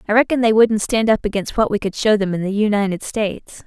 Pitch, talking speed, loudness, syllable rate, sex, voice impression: 210 Hz, 280 wpm, -18 LUFS, 6.0 syllables/s, female, very feminine, slightly young, thin, very tensed, slightly powerful, bright, slightly hard, very clear, very fluent, cute, very intellectual, refreshing, sincere, slightly calm, very friendly, reassuring, unique, very elegant, slightly wild, sweet, very lively, kind, slightly intense, slightly modest, light